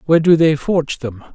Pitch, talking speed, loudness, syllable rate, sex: 150 Hz, 225 wpm, -15 LUFS, 6.3 syllables/s, male